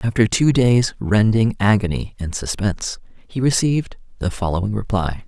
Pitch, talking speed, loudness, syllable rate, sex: 110 Hz, 135 wpm, -19 LUFS, 4.9 syllables/s, male